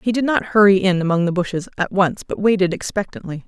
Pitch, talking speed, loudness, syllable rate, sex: 190 Hz, 225 wpm, -18 LUFS, 6.1 syllables/s, female